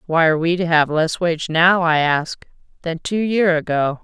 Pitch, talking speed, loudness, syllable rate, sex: 165 Hz, 210 wpm, -17 LUFS, 4.6 syllables/s, female